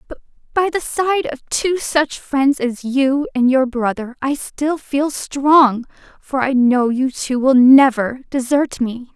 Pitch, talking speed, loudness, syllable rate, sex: 270 Hz, 155 wpm, -17 LUFS, 3.7 syllables/s, female